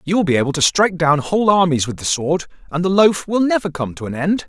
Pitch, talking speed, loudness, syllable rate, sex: 170 Hz, 280 wpm, -17 LUFS, 6.4 syllables/s, male